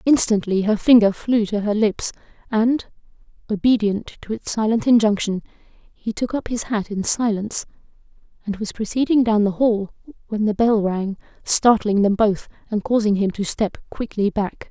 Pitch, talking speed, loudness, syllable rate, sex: 215 Hz, 165 wpm, -20 LUFS, 4.7 syllables/s, female